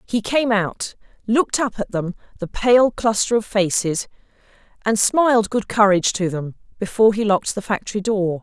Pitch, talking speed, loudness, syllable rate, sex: 210 Hz, 155 wpm, -19 LUFS, 5.2 syllables/s, female